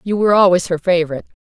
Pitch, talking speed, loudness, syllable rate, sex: 180 Hz, 205 wpm, -15 LUFS, 8.4 syllables/s, female